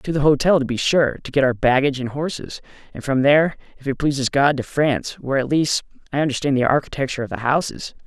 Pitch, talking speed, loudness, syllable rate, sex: 140 Hz, 230 wpm, -20 LUFS, 6.5 syllables/s, male